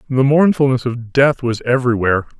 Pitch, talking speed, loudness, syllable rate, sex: 125 Hz, 150 wpm, -15 LUFS, 5.7 syllables/s, male